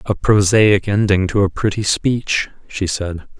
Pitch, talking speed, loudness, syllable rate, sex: 100 Hz, 160 wpm, -16 LUFS, 4.0 syllables/s, male